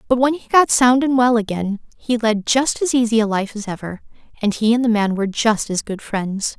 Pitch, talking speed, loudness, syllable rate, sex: 225 Hz, 245 wpm, -18 LUFS, 5.3 syllables/s, female